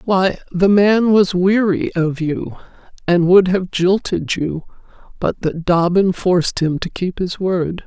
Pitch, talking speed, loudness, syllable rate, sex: 180 Hz, 160 wpm, -16 LUFS, 3.8 syllables/s, female